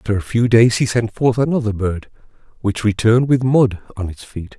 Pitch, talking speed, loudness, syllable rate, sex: 110 Hz, 210 wpm, -17 LUFS, 5.4 syllables/s, male